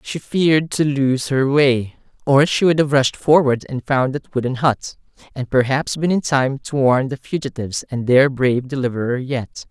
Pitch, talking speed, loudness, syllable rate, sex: 135 Hz, 190 wpm, -18 LUFS, 4.7 syllables/s, male